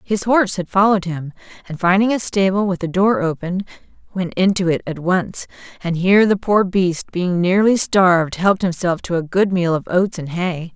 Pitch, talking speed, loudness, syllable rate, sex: 185 Hz, 200 wpm, -17 LUFS, 5.1 syllables/s, female